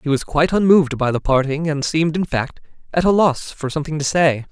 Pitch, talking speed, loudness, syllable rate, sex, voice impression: 155 Hz, 240 wpm, -18 LUFS, 6.1 syllables/s, male, masculine, slightly adult-like, fluent, refreshing, slightly sincere, lively